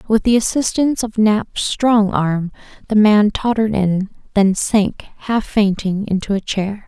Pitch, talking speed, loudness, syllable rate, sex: 210 Hz, 155 wpm, -17 LUFS, 4.2 syllables/s, female